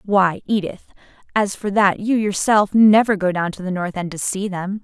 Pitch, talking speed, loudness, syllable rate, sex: 195 Hz, 210 wpm, -18 LUFS, 4.8 syllables/s, female